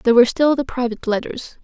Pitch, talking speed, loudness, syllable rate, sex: 250 Hz, 220 wpm, -18 LUFS, 7.1 syllables/s, female